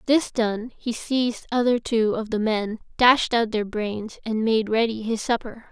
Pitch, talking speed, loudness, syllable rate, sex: 225 Hz, 190 wpm, -23 LUFS, 4.3 syllables/s, female